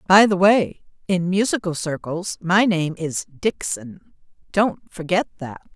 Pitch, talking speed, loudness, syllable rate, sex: 180 Hz, 135 wpm, -21 LUFS, 3.8 syllables/s, female